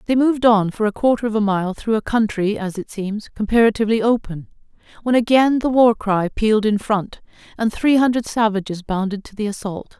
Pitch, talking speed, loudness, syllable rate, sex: 215 Hz, 200 wpm, -19 LUFS, 5.5 syllables/s, female